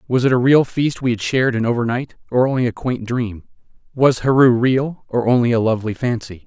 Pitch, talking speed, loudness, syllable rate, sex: 120 Hz, 215 wpm, -18 LUFS, 5.6 syllables/s, male